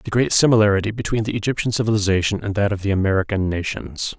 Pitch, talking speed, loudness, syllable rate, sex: 105 Hz, 185 wpm, -19 LUFS, 6.9 syllables/s, male